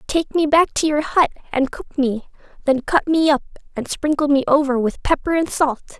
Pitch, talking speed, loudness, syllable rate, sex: 290 Hz, 210 wpm, -19 LUFS, 5.1 syllables/s, female